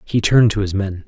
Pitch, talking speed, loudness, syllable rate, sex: 105 Hz, 280 wpm, -16 LUFS, 6.3 syllables/s, male